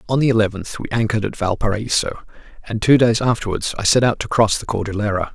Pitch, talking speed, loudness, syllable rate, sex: 110 Hz, 200 wpm, -19 LUFS, 6.5 syllables/s, male